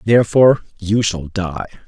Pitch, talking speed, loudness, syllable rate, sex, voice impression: 100 Hz, 130 wpm, -16 LUFS, 5.2 syllables/s, male, masculine, adult-like, slightly thin, relaxed, slightly weak, slightly soft, slightly raspy, slightly calm, mature, slightly friendly, unique, slightly wild